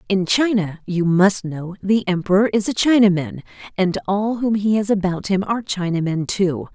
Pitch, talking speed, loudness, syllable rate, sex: 195 Hz, 180 wpm, -19 LUFS, 4.8 syllables/s, female